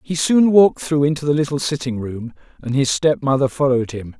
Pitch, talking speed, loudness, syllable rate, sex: 140 Hz, 215 wpm, -18 LUFS, 5.8 syllables/s, male